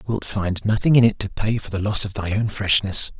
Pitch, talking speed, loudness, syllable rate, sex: 105 Hz, 265 wpm, -20 LUFS, 5.3 syllables/s, male